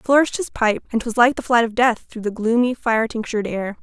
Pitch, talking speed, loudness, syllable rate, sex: 230 Hz, 265 wpm, -19 LUFS, 6.1 syllables/s, female